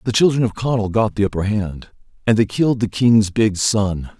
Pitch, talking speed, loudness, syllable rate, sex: 105 Hz, 215 wpm, -18 LUFS, 5.2 syllables/s, male